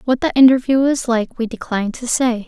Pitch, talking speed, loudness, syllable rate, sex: 245 Hz, 220 wpm, -16 LUFS, 5.6 syllables/s, female